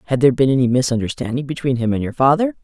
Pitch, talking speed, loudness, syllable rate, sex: 135 Hz, 230 wpm, -18 LUFS, 7.5 syllables/s, female